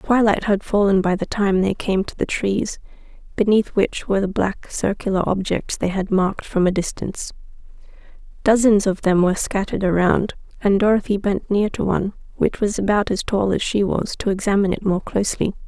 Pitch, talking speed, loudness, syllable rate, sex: 200 Hz, 190 wpm, -20 LUFS, 5.5 syllables/s, female